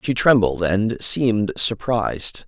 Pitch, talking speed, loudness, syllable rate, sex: 110 Hz, 120 wpm, -19 LUFS, 3.9 syllables/s, male